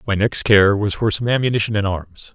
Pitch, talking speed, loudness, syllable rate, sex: 105 Hz, 230 wpm, -18 LUFS, 5.4 syllables/s, male